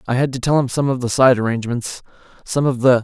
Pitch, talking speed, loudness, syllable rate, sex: 125 Hz, 255 wpm, -18 LUFS, 6.4 syllables/s, male